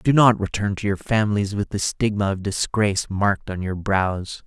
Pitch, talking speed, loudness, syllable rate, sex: 100 Hz, 200 wpm, -22 LUFS, 5.0 syllables/s, male